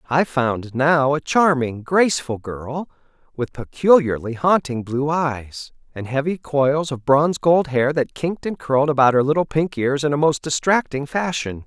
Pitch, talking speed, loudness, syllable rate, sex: 145 Hz, 170 wpm, -19 LUFS, 4.5 syllables/s, male